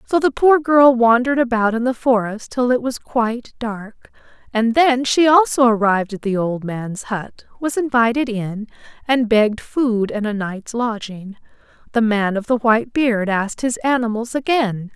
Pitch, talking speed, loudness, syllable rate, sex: 235 Hz, 175 wpm, -18 LUFS, 4.6 syllables/s, female